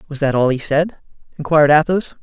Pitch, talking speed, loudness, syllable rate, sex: 150 Hz, 190 wpm, -16 LUFS, 6.2 syllables/s, male